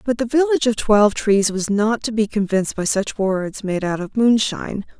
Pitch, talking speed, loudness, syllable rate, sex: 215 Hz, 215 wpm, -19 LUFS, 5.2 syllables/s, female